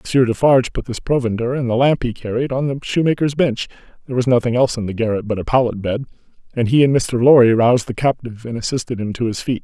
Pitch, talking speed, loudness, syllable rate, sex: 125 Hz, 245 wpm, -17 LUFS, 5.2 syllables/s, male